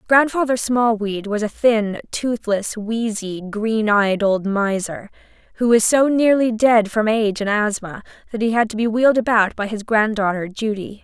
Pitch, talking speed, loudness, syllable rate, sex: 220 Hz, 170 wpm, -19 LUFS, 4.6 syllables/s, female